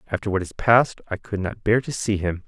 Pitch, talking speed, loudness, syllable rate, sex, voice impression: 105 Hz, 265 wpm, -22 LUFS, 5.8 syllables/s, male, very masculine, very adult-like, intellectual, slightly mature, slightly wild